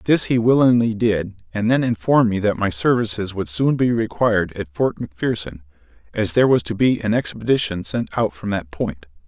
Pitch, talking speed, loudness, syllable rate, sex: 105 Hz, 195 wpm, -20 LUFS, 5.4 syllables/s, male